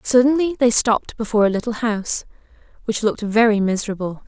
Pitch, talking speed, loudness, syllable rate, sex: 220 Hz, 155 wpm, -19 LUFS, 6.5 syllables/s, female